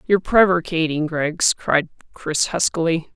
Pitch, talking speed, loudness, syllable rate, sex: 165 Hz, 115 wpm, -19 LUFS, 4.7 syllables/s, female